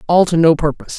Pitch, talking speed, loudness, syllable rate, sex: 165 Hz, 245 wpm, -14 LUFS, 7.2 syllables/s, male